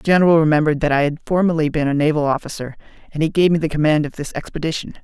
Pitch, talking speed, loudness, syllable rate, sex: 155 Hz, 240 wpm, -18 LUFS, 7.6 syllables/s, male